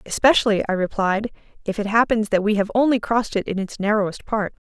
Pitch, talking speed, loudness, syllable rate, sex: 210 Hz, 205 wpm, -21 LUFS, 6.2 syllables/s, female